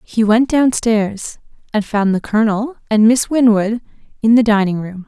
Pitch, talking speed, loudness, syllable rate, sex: 220 Hz, 165 wpm, -15 LUFS, 4.6 syllables/s, female